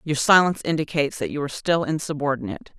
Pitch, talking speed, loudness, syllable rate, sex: 150 Hz, 170 wpm, -22 LUFS, 7.2 syllables/s, female